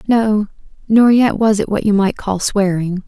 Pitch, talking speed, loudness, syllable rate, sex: 205 Hz, 195 wpm, -15 LUFS, 4.4 syllables/s, female